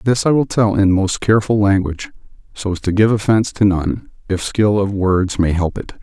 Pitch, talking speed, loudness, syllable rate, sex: 100 Hz, 220 wpm, -16 LUFS, 5.4 syllables/s, male